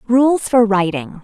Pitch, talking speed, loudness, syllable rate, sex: 215 Hz, 145 wpm, -15 LUFS, 3.7 syllables/s, female